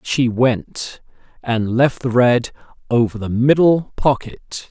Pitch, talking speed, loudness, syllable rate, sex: 125 Hz, 130 wpm, -17 LUFS, 3.4 syllables/s, male